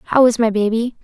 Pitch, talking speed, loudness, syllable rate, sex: 225 Hz, 230 wpm, -16 LUFS, 5.3 syllables/s, female